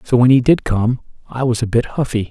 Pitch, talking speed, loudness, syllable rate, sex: 120 Hz, 260 wpm, -16 LUFS, 5.7 syllables/s, male